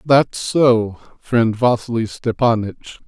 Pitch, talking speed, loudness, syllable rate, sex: 115 Hz, 100 wpm, -17 LUFS, 3.3 syllables/s, male